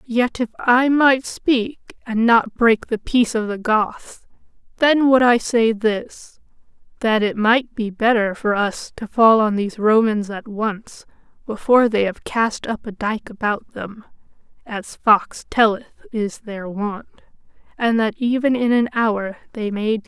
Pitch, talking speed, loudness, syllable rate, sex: 220 Hz, 170 wpm, -19 LUFS, 4.0 syllables/s, female